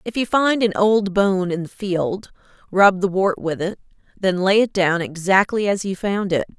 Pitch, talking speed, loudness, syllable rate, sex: 190 Hz, 210 wpm, -19 LUFS, 4.5 syllables/s, female